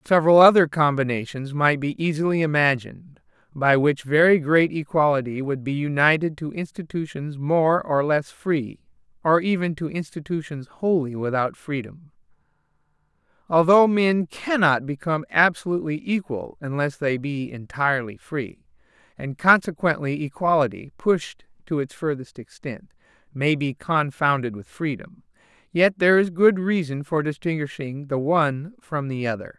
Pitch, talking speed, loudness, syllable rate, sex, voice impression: 155 Hz, 130 wpm, -22 LUFS, 4.7 syllables/s, male, masculine, adult-like, slightly powerful, slightly halting, friendly, unique, slightly wild, lively, slightly intense, slightly sharp